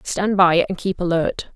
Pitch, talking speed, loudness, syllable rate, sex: 180 Hz, 195 wpm, -19 LUFS, 4.2 syllables/s, female